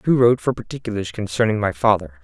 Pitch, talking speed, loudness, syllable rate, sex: 105 Hz, 190 wpm, -20 LUFS, 6.7 syllables/s, male